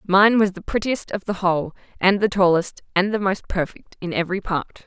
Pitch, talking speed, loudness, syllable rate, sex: 190 Hz, 210 wpm, -21 LUFS, 5.3 syllables/s, female